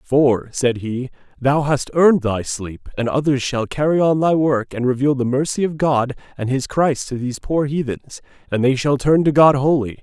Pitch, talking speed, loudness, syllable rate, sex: 135 Hz, 210 wpm, -18 LUFS, 4.8 syllables/s, male